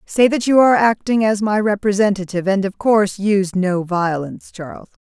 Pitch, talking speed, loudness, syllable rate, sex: 200 Hz, 180 wpm, -16 LUFS, 5.6 syllables/s, female